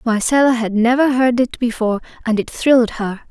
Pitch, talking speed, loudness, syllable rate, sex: 240 Hz, 180 wpm, -16 LUFS, 5.4 syllables/s, female